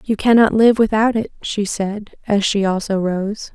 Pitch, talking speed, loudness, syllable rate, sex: 210 Hz, 185 wpm, -17 LUFS, 4.4 syllables/s, female